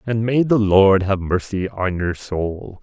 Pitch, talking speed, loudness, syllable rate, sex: 100 Hz, 190 wpm, -18 LUFS, 3.7 syllables/s, male